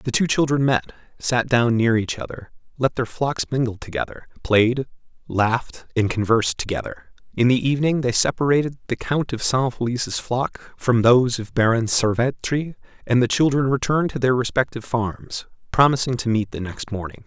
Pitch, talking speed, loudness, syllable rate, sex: 120 Hz, 170 wpm, -21 LUFS, 5.2 syllables/s, male